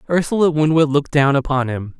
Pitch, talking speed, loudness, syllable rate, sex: 145 Hz, 180 wpm, -17 LUFS, 6.2 syllables/s, male